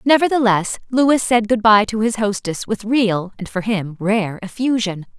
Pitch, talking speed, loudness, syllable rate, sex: 215 Hz, 175 wpm, -18 LUFS, 4.4 syllables/s, female